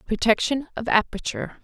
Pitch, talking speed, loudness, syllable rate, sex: 235 Hz, 110 wpm, -23 LUFS, 5.8 syllables/s, female